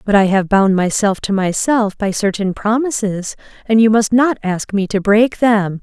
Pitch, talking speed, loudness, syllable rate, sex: 210 Hz, 195 wpm, -15 LUFS, 4.4 syllables/s, female